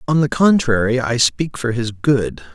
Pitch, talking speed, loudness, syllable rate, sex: 125 Hz, 190 wpm, -17 LUFS, 4.4 syllables/s, male